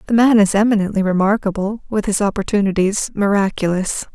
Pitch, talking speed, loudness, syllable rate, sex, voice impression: 205 Hz, 115 wpm, -17 LUFS, 5.8 syllables/s, female, feminine, adult-like, fluent, slightly cute, refreshing, friendly, kind